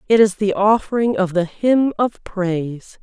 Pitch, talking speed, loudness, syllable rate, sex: 205 Hz, 180 wpm, -18 LUFS, 4.3 syllables/s, female